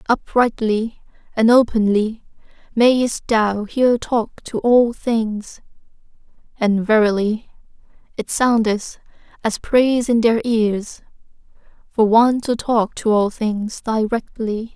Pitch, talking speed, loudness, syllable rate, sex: 225 Hz, 105 wpm, -18 LUFS, 3.6 syllables/s, female